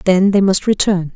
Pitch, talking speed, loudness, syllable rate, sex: 190 Hz, 205 wpm, -14 LUFS, 5.0 syllables/s, female